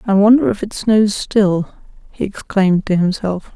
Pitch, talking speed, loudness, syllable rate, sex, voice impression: 200 Hz, 170 wpm, -16 LUFS, 4.6 syllables/s, female, feminine, adult-like, slightly weak, slightly dark, calm, slightly unique